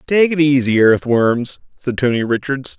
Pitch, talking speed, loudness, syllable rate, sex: 130 Hz, 150 wpm, -15 LUFS, 4.4 syllables/s, male